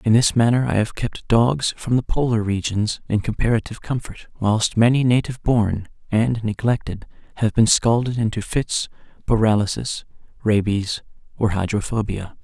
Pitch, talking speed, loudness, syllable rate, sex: 110 Hz, 140 wpm, -20 LUFS, 4.9 syllables/s, male